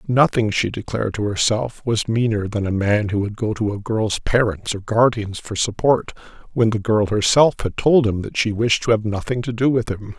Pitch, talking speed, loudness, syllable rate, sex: 110 Hz, 225 wpm, -19 LUFS, 5.0 syllables/s, male